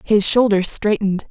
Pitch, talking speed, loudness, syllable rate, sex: 205 Hz, 140 wpm, -16 LUFS, 5.0 syllables/s, female